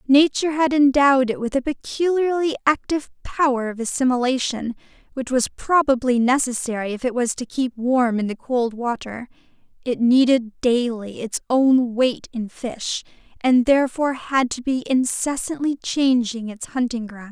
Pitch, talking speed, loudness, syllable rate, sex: 255 Hz, 150 wpm, -21 LUFS, 4.8 syllables/s, female